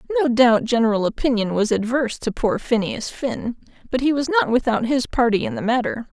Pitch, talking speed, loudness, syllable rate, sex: 235 Hz, 195 wpm, -20 LUFS, 5.6 syllables/s, female